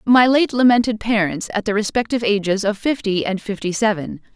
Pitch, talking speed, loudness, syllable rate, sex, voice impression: 220 Hz, 180 wpm, -18 LUFS, 5.6 syllables/s, female, feminine, adult-like, fluent, sincere, slightly intense